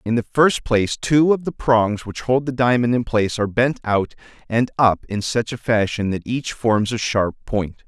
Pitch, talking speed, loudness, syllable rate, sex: 115 Hz, 220 wpm, -19 LUFS, 4.8 syllables/s, male